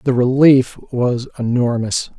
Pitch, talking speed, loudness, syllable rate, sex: 125 Hz, 110 wpm, -16 LUFS, 3.9 syllables/s, male